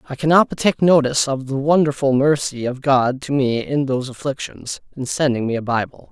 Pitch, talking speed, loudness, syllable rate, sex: 135 Hz, 205 wpm, -18 LUFS, 5.5 syllables/s, male